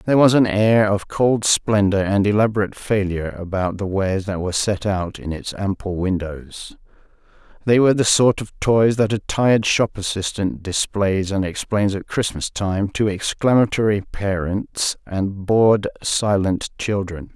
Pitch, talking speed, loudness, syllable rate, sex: 100 Hz, 155 wpm, -19 LUFS, 4.6 syllables/s, male